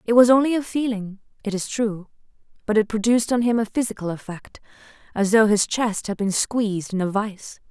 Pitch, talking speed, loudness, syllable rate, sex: 215 Hz, 200 wpm, -21 LUFS, 5.5 syllables/s, female